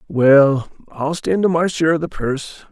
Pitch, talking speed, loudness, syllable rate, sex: 155 Hz, 200 wpm, -17 LUFS, 4.8 syllables/s, male